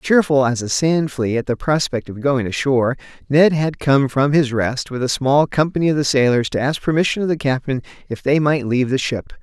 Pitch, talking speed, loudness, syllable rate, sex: 135 Hz, 230 wpm, -18 LUFS, 5.3 syllables/s, male